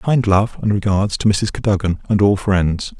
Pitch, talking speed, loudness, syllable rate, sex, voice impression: 100 Hz, 200 wpm, -17 LUFS, 4.7 syllables/s, male, masculine, adult-like, relaxed, slightly powerful, soft, muffled, raspy, slightly intellectual, calm, slightly mature, friendly, slightly wild, kind, modest